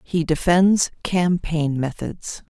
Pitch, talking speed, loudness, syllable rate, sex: 165 Hz, 95 wpm, -20 LUFS, 3.1 syllables/s, female